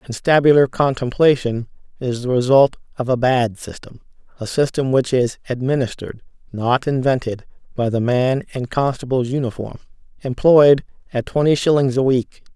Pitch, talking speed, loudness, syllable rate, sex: 130 Hz, 135 wpm, -18 LUFS, 4.9 syllables/s, male